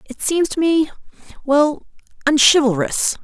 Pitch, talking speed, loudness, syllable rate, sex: 285 Hz, 75 wpm, -17 LUFS, 4.2 syllables/s, female